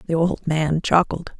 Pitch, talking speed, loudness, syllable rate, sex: 165 Hz, 170 wpm, -20 LUFS, 4.4 syllables/s, female